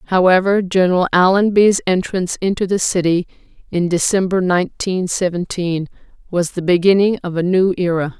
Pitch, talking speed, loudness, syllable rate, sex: 180 Hz, 130 wpm, -16 LUFS, 5.2 syllables/s, female